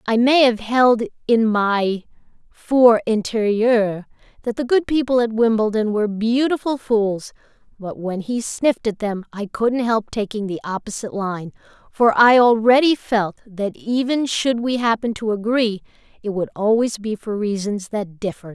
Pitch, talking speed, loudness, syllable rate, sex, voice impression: 220 Hz, 160 wpm, -19 LUFS, 4.5 syllables/s, female, very feminine, slightly young, thin, tensed, slightly powerful, bright, hard, clear, fluent, cute, intellectual, refreshing, sincere, slightly calm, friendly, reassuring, very unique, slightly elegant, slightly wild, slightly sweet, lively, strict, slightly intense, sharp, light